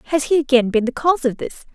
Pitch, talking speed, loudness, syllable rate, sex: 270 Hz, 275 wpm, -18 LUFS, 7.0 syllables/s, female